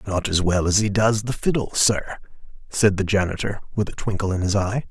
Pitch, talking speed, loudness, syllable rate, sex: 100 Hz, 220 wpm, -22 LUFS, 5.5 syllables/s, male